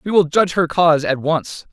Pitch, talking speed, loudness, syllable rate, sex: 160 Hz, 245 wpm, -17 LUFS, 5.7 syllables/s, male